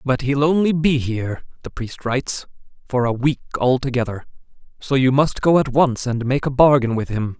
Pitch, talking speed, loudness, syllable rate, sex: 130 Hz, 195 wpm, -19 LUFS, 5.2 syllables/s, male